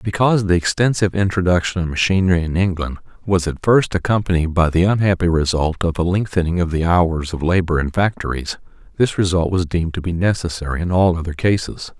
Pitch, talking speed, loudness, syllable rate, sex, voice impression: 90 Hz, 185 wpm, -18 LUFS, 6.0 syllables/s, male, very masculine, very adult-like, middle-aged, very thick, slightly relaxed, powerful, dark, slightly soft, muffled, fluent, very cool, very intellectual, sincere, very calm, very mature, very friendly, very reassuring, unique, elegant, slightly wild, sweet, kind, slightly modest